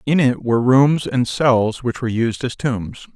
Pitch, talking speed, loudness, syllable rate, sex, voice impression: 125 Hz, 210 wpm, -18 LUFS, 4.4 syllables/s, male, very masculine, very adult-like, old, very thick, slightly tensed, slightly weak, slightly dark, soft, clear, fluent, slightly raspy, very cool, intellectual, very sincere, calm, very mature, very friendly, very reassuring, very unique, elegant, slightly wild, sweet, slightly lively, slightly strict, slightly intense, slightly modest